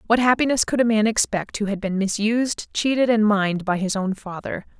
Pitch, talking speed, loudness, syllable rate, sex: 215 Hz, 215 wpm, -21 LUFS, 5.6 syllables/s, female